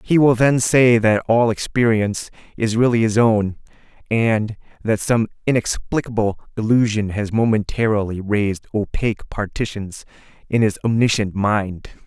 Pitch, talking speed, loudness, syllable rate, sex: 110 Hz, 125 wpm, -19 LUFS, 4.6 syllables/s, male